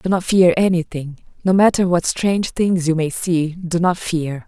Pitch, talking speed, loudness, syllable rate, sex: 175 Hz, 200 wpm, -18 LUFS, 4.6 syllables/s, female